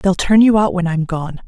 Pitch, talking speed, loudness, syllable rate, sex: 185 Hz, 285 wpm, -15 LUFS, 5.1 syllables/s, female